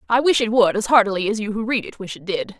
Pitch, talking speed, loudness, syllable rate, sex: 215 Hz, 325 wpm, -19 LUFS, 6.6 syllables/s, female